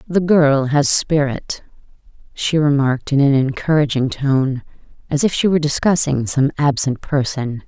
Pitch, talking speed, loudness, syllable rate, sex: 140 Hz, 140 wpm, -17 LUFS, 4.6 syllables/s, female